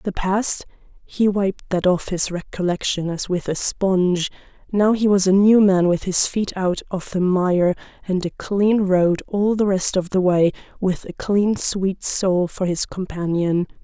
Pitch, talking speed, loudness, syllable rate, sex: 185 Hz, 180 wpm, -20 LUFS, 4.1 syllables/s, female